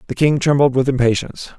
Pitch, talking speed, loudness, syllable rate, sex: 135 Hz, 190 wpm, -16 LUFS, 6.8 syllables/s, male